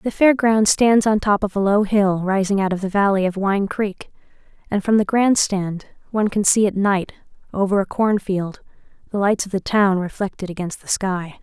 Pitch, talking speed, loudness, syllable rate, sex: 200 Hz, 210 wpm, -19 LUFS, 4.9 syllables/s, female